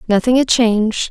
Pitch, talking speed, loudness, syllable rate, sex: 230 Hz, 165 wpm, -14 LUFS, 5.4 syllables/s, female